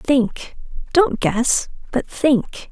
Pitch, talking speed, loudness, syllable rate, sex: 275 Hz, 110 wpm, -19 LUFS, 2.7 syllables/s, female